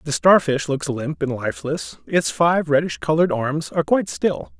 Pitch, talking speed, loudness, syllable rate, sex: 145 Hz, 185 wpm, -20 LUFS, 5.1 syllables/s, male